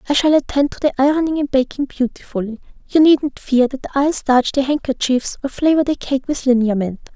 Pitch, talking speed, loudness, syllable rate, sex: 270 Hz, 185 wpm, -17 LUFS, 5.4 syllables/s, female